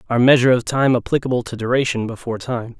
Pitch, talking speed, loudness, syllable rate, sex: 120 Hz, 195 wpm, -18 LUFS, 6.8 syllables/s, male